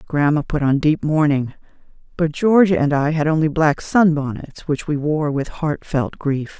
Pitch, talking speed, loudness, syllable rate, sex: 150 Hz, 180 wpm, -18 LUFS, 4.5 syllables/s, female